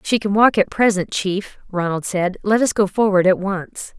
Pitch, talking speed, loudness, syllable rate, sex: 195 Hz, 210 wpm, -18 LUFS, 4.6 syllables/s, female